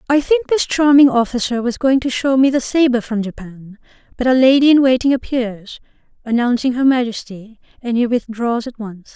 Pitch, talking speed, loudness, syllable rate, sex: 245 Hz, 185 wpm, -15 LUFS, 5.2 syllables/s, female